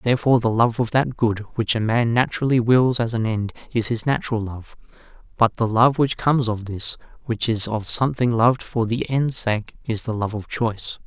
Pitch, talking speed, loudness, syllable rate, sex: 115 Hz, 210 wpm, -21 LUFS, 5.4 syllables/s, male